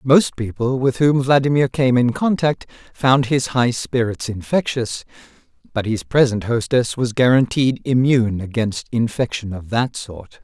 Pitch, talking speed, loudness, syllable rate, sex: 120 Hz, 145 wpm, -18 LUFS, 4.5 syllables/s, male